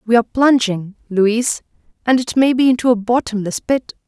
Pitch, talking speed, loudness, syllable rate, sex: 235 Hz, 160 wpm, -16 LUFS, 5.2 syllables/s, female